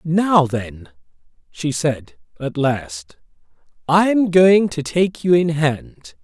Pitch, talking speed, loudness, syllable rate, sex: 150 Hz, 135 wpm, -17 LUFS, 3.0 syllables/s, male